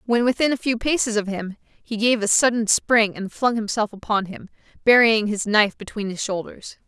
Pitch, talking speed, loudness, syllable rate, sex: 220 Hz, 200 wpm, -20 LUFS, 5.2 syllables/s, female